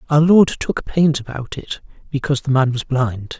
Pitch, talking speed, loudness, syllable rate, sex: 140 Hz, 195 wpm, -18 LUFS, 4.9 syllables/s, male